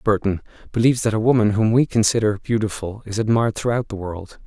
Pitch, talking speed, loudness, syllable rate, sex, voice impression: 110 Hz, 190 wpm, -20 LUFS, 6.3 syllables/s, male, masculine, adult-like, slightly tensed, soft, slightly raspy, cool, intellectual, calm, friendly, wild, kind, slightly modest